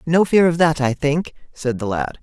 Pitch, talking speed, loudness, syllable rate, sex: 150 Hz, 245 wpm, -18 LUFS, 4.7 syllables/s, male